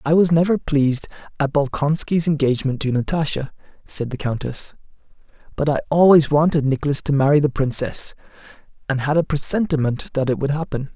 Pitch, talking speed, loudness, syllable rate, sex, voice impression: 145 Hz, 160 wpm, -19 LUFS, 5.7 syllables/s, male, slightly masculine, slightly gender-neutral, slightly thin, slightly muffled, slightly raspy, slightly intellectual, kind, slightly modest